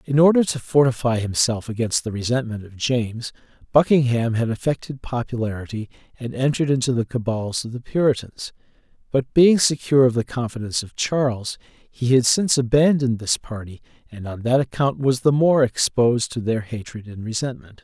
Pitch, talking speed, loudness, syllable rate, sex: 125 Hz, 165 wpm, -21 LUFS, 5.5 syllables/s, male